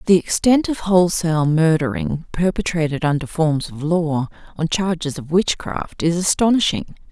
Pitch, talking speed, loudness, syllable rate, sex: 170 Hz, 135 wpm, -19 LUFS, 4.8 syllables/s, female